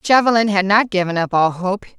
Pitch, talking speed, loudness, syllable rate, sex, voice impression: 200 Hz, 210 wpm, -16 LUFS, 5.6 syllables/s, female, feminine, middle-aged, tensed, powerful, clear, slightly fluent, intellectual, calm, elegant, lively, slightly sharp